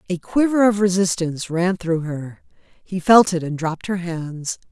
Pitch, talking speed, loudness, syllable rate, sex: 180 Hz, 180 wpm, -20 LUFS, 4.6 syllables/s, female